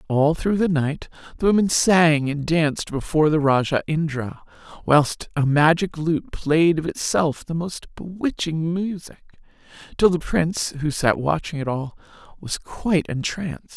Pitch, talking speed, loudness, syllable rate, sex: 160 Hz, 155 wpm, -21 LUFS, 4.5 syllables/s, female